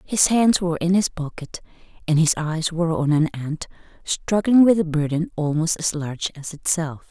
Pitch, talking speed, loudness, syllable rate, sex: 165 Hz, 185 wpm, -21 LUFS, 5.0 syllables/s, female